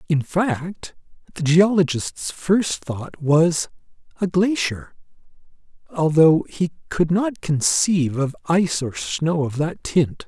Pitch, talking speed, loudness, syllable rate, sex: 165 Hz, 125 wpm, -20 LUFS, 3.5 syllables/s, male